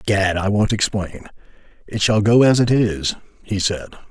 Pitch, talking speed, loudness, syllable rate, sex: 100 Hz, 175 wpm, -18 LUFS, 4.9 syllables/s, male